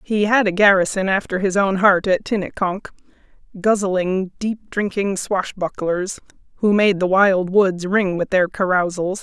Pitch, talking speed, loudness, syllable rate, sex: 190 Hz, 150 wpm, -18 LUFS, 4.3 syllables/s, female